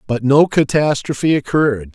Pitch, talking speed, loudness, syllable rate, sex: 135 Hz, 125 wpm, -15 LUFS, 5.0 syllables/s, male